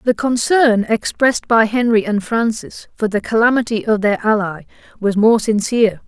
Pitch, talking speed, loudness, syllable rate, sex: 220 Hz, 160 wpm, -16 LUFS, 4.9 syllables/s, female